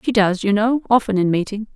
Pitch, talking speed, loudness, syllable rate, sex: 210 Hz, 240 wpm, -18 LUFS, 5.9 syllables/s, female